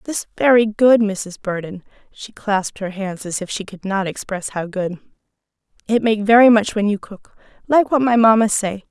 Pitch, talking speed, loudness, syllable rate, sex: 210 Hz, 180 wpm, -18 LUFS, 5.0 syllables/s, female